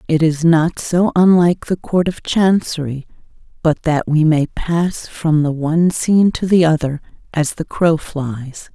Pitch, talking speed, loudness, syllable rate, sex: 160 Hz, 170 wpm, -16 LUFS, 4.2 syllables/s, female